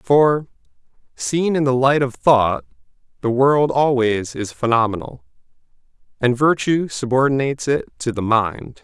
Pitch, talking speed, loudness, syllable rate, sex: 130 Hz, 130 wpm, -18 LUFS, 4.4 syllables/s, male